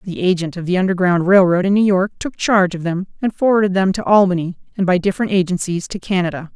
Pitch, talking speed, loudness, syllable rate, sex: 185 Hz, 230 wpm, -17 LUFS, 6.4 syllables/s, female